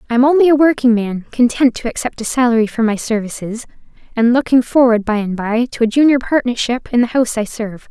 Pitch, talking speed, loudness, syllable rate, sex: 240 Hz, 220 wpm, -15 LUFS, 6.2 syllables/s, female